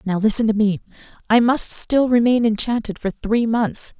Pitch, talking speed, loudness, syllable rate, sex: 220 Hz, 180 wpm, -18 LUFS, 4.7 syllables/s, female